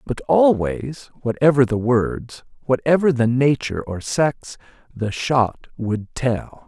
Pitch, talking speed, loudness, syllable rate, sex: 125 Hz, 125 wpm, -20 LUFS, 3.7 syllables/s, male